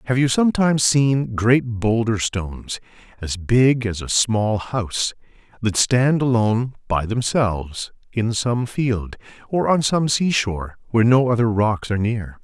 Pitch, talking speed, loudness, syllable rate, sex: 115 Hz, 150 wpm, -20 LUFS, 4.3 syllables/s, male